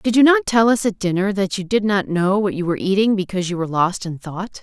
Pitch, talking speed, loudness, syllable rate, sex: 195 Hz, 285 wpm, -19 LUFS, 6.1 syllables/s, female